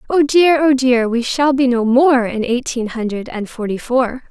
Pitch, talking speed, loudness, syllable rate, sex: 250 Hz, 210 wpm, -15 LUFS, 4.4 syllables/s, female